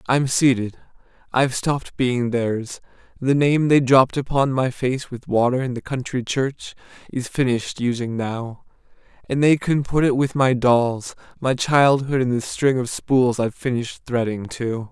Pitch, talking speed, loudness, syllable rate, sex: 125 Hz, 170 wpm, -20 LUFS, 4.5 syllables/s, male